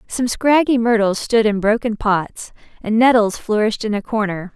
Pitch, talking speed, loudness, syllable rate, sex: 220 Hz, 170 wpm, -17 LUFS, 4.9 syllables/s, female